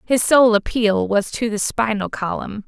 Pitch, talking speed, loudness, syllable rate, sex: 215 Hz, 180 wpm, -18 LUFS, 4.3 syllables/s, female